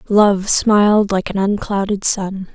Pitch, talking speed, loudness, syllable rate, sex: 200 Hz, 140 wpm, -15 LUFS, 3.9 syllables/s, female